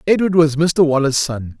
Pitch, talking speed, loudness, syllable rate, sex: 150 Hz, 190 wpm, -15 LUFS, 4.8 syllables/s, male